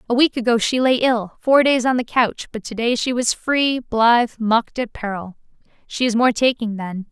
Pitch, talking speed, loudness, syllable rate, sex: 235 Hz, 210 wpm, -18 LUFS, 5.0 syllables/s, female